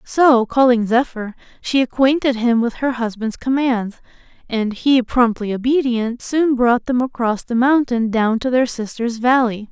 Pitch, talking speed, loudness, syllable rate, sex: 245 Hz, 155 wpm, -17 LUFS, 4.3 syllables/s, female